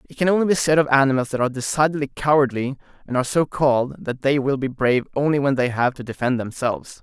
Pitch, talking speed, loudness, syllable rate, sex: 135 Hz, 230 wpm, -20 LUFS, 6.7 syllables/s, male